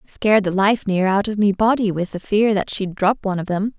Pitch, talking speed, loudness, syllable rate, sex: 200 Hz, 270 wpm, -19 LUFS, 5.5 syllables/s, female